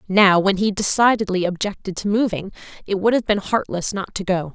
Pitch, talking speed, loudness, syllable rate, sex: 195 Hz, 200 wpm, -20 LUFS, 5.4 syllables/s, female